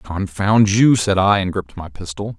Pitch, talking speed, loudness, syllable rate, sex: 100 Hz, 200 wpm, -17 LUFS, 4.7 syllables/s, male